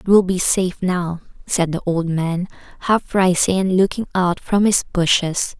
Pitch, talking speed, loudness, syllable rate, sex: 180 Hz, 180 wpm, -18 LUFS, 4.4 syllables/s, female